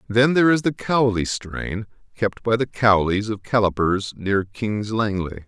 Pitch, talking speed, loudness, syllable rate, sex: 110 Hz, 165 wpm, -21 LUFS, 4.4 syllables/s, male